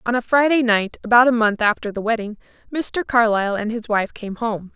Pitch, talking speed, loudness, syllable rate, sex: 225 Hz, 215 wpm, -19 LUFS, 5.5 syllables/s, female